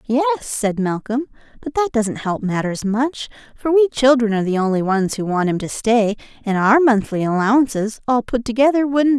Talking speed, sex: 205 wpm, female